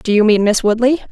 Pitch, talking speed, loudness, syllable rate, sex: 225 Hz, 270 wpm, -13 LUFS, 6.2 syllables/s, female